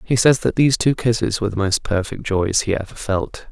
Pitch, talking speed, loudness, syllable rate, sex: 110 Hz, 240 wpm, -19 LUFS, 5.6 syllables/s, male